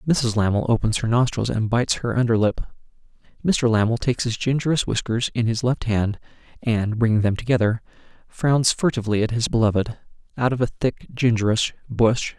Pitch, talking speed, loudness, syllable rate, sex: 115 Hz, 170 wpm, -21 LUFS, 5.5 syllables/s, male